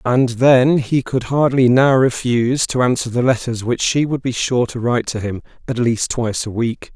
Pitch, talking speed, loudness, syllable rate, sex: 125 Hz, 215 wpm, -17 LUFS, 4.9 syllables/s, male